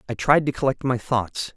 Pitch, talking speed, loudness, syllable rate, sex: 125 Hz, 230 wpm, -22 LUFS, 5.2 syllables/s, male